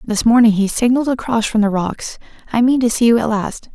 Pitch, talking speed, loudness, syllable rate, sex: 230 Hz, 240 wpm, -15 LUFS, 5.8 syllables/s, female